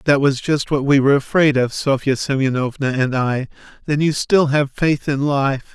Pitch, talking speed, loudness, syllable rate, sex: 140 Hz, 200 wpm, -18 LUFS, 4.8 syllables/s, male